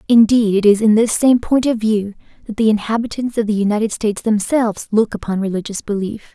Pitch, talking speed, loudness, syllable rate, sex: 215 Hz, 200 wpm, -16 LUFS, 5.9 syllables/s, female